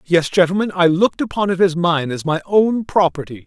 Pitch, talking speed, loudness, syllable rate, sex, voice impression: 175 Hz, 210 wpm, -17 LUFS, 5.5 syllables/s, male, masculine, adult-like, slightly thick, fluent, slightly refreshing, sincere, slightly unique